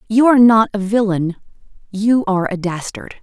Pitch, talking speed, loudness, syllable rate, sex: 205 Hz, 165 wpm, -15 LUFS, 5.5 syllables/s, female